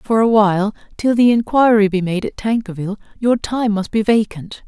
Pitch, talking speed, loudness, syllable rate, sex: 215 Hz, 190 wpm, -16 LUFS, 5.3 syllables/s, female